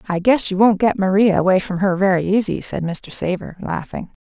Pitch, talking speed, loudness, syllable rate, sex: 190 Hz, 215 wpm, -18 LUFS, 5.4 syllables/s, female